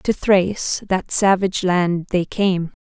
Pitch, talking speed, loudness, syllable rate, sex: 185 Hz, 150 wpm, -19 LUFS, 3.9 syllables/s, female